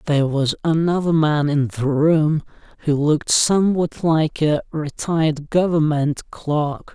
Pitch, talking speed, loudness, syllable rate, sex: 155 Hz, 130 wpm, -19 LUFS, 4.0 syllables/s, male